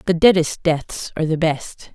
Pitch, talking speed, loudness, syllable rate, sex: 165 Hz, 185 wpm, -19 LUFS, 4.7 syllables/s, female